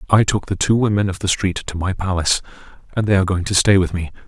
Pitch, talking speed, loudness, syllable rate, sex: 95 Hz, 265 wpm, -18 LUFS, 6.7 syllables/s, male